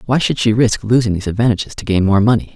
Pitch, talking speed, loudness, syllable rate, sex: 105 Hz, 260 wpm, -15 LUFS, 7.1 syllables/s, male